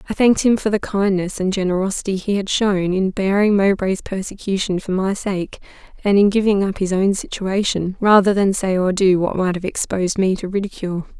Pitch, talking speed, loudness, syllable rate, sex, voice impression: 195 Hz, 200 wpm, -18 LUFS, 5.5 syllables/s, female, very feminine, very adult-like, middle-aged, very thin, tensed, slightly powerful, bright, slightly hard, very clear, very fluent, slightly cool, very intellectual, very refreshing, very sincere, calm, slightly friendly, reassuring, slightly unique, slightly lively, strict, sharp, slightly modest